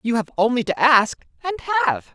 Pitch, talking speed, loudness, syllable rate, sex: 215 Hz, 195 wpm, -19 LUFS, 6.6 syllables/s, male